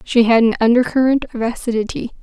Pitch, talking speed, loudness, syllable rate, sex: 235 Hz, 160 wpm, -16 LUFS, 6.1 syllables/s, female